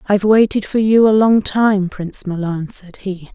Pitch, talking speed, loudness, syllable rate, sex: 200 Hz, 195 wpm, -15 LUFS, 4.6 syllables/s, female